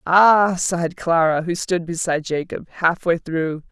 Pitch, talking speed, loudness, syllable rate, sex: 170 Hz, 145 wpm, -19 LUFS, 4.3 syllables/s, female